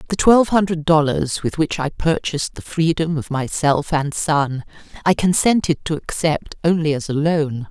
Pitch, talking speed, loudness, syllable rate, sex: 160 Hz, 170 wpm, -19 LUFS, 4.7 syllables/s, female